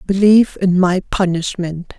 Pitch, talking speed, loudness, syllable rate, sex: 185 Hz, 120 wpm, -15 LUFS, 4.5 syllables/s, female